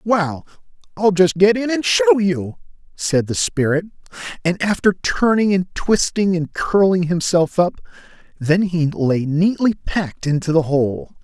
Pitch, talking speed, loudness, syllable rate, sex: 175 Hz, 150 wpm, -18 LUFS, 4.2 syllables/s, male